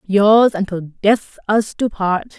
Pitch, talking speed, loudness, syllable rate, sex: 205 Hz, 150 wpm, -16 LUFS, 3.4 syllables/s, female